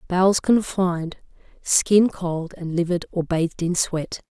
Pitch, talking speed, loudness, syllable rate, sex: 175 Hz, 140 wpm, -21 LUFS, 4.1 syllables/s, female